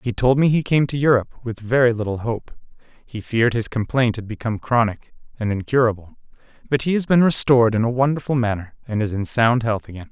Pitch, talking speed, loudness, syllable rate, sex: 120 Hz, 210 wpm, -20 LUFS, 6.1 syllables/s, male